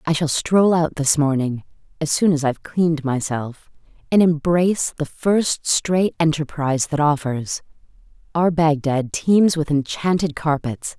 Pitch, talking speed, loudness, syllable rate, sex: 155 Hz, 140 wpm, -19 LUFS, 4.3 syllables/s, female